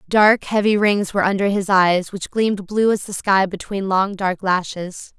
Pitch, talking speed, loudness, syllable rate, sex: 195 Hz, 195 wpm, -18 LUFS, 4.6 syllables/s, female